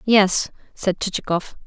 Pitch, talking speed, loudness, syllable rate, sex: 195 Hz, 110 wpm, -21 LUFS, 4.0 syllables/s, female